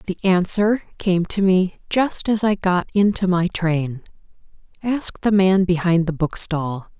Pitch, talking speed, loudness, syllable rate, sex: 185 Hz, 155 wpm, -19 LUFS, 3.8 syllables/s, female